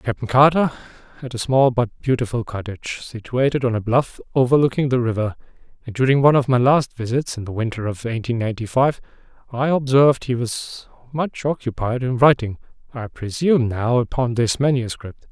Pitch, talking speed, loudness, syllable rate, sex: 125 Hz, 170 wpm, -20 LUFS, 5.5 syllables/s, male